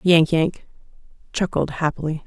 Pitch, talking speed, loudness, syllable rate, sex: 165 Hz, 105 wpm, -21 LUFS, 4.6 syllables/s, female